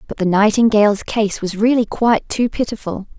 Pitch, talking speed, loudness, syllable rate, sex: 215 Hz, 170 wpm, -16 LUFS, 5.4 syllables/s, female